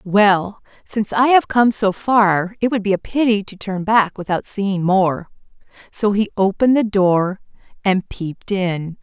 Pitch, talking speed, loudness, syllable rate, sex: 200 Hz, 175 wpm, -18 LUFS, 4.2 syllables/s, female